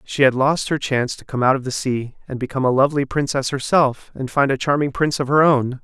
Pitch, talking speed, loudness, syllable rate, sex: 135 Hz, 255 wpm, -19 LUFS, 6.1 syllables/s, male